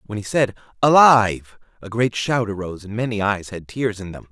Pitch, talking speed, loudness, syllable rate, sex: 110 Hz, 210 wpm, -19 LUFS, 5.5 syllables/s, male